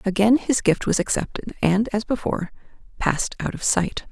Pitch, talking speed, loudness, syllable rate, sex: 210 Hz, 175 wpm, -22 LUFS, 5.2 syllables/s, female